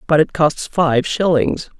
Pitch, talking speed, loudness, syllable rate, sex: 155 Hz, 165 wpm, -16 LUFS, 3.9 syllables/s, male